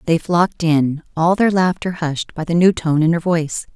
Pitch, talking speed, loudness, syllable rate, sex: 165 Hz, 225 wpm, -17 LUFS, 5.0 syllables/s, female